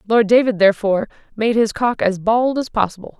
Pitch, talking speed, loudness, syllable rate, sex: 220 Hz, 190 wpm, -17 LUFS, 5.9 syllables/s, female